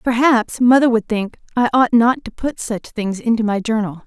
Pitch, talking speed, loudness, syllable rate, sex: 230 Hz, 205 wpm, -17 LUFS, 4.8 syllables/s, female